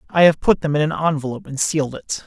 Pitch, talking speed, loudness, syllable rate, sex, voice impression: 150 Hz, 265 wpm, -19 LUFS, 6.7 syllables/s, male, masculine, adult-like, relaxed, fluent, slightly raspy, sincere, calm, reassuring, wild, kind, modest